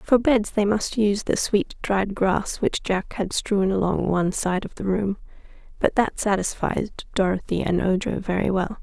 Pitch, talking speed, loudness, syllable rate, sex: 200 Hz, 185 wpm, -23 LUFS, 4.7 syllables/s, female